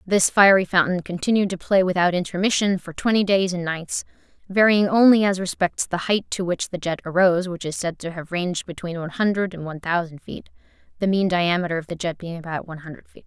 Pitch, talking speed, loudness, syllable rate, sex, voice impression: 180 Hz, 215 wpm, -21 LUFS, 6.0 syllables/s, female, feminine, adult-like, tensed, powerful, slightly hard, fluent, nasal, intellectual, calm, slightly lively, strict, sharp